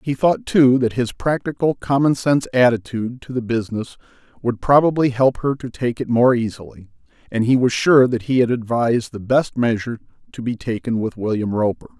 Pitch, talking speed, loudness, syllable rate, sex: 120 Hz, 190 wpm, -19 LUFS, 5.5 syllables/s, male